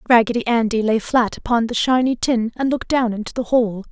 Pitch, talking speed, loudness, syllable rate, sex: 235 Hz, 215 wpm, -19 LUFS, 5.8 syllables/s, female